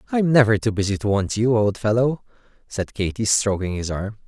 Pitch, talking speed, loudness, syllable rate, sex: 110 Hz, 195 wpm, -21 LUFS, 5.4 syllables/s, male